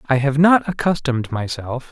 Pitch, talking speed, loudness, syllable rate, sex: 140 Hz, 155 wpm, -18 LUFS, 5.0 syllables/s, male